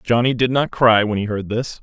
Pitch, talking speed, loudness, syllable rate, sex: 115 Hz, 265 wpm, -18 LUFS, 5.2 syllables/s, male